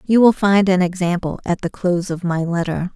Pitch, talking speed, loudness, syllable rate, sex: 180 Hz, 225 wpm, -18 LUFS, 5.4 syllables/s, female